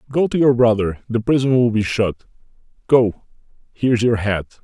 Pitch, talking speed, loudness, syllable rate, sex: 115 Hz, 170 wpm, -18 LUFS, 4.9 syllables/s, male